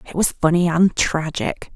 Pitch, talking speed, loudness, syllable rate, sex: 165 Hz, 170 wpm, -19 LUFS, 4.5 syllables/s, female